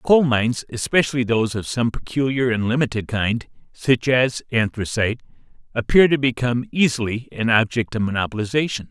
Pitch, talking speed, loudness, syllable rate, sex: 120 Hz, 140 wpm, -20 LUFS, 5.6 syllables/s, male